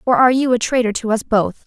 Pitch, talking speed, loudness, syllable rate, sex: 235 Hz, 290 wpm, -16 LUFS, 6.5 syllables/s, female